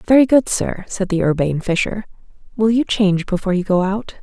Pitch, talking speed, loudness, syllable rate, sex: 200 Hz, 200 wpm, -17 LUFS, 6.0 syllables/s, female